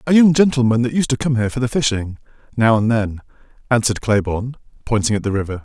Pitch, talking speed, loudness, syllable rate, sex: 120 Hz, 215 wpm, -17 LUFS, 6.9 syllables/s, male